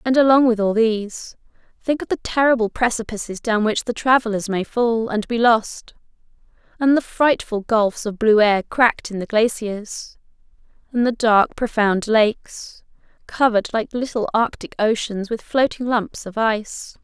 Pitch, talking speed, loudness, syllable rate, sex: 225 Hz, 160 wpm, -19 LUFS, 4.6 syllables/s, female